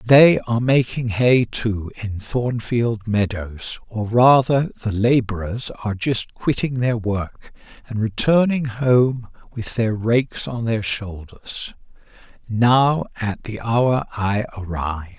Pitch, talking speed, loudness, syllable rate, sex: 115 Hz, 125 wpm, -20 LUFS, 3.7 syllables/s, male